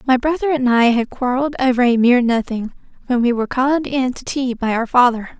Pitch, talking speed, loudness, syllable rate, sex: 250 Hz, 225 wpm, -17 LUFS, 5.9 syllables/s, female